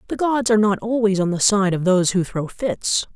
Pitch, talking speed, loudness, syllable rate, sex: 200 Hz, 245 wpm, -19 LUFS, 5.6 syllables/s, female